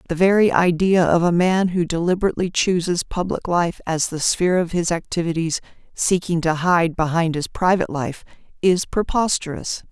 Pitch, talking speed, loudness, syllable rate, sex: 175 Hz, 155 wpm, -20 LUFS, 5.2 syllables/s, female